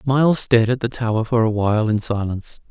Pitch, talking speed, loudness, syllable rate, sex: 115 Hz, 220 wpm, -19 LUFS, 6.3 syllables/s, male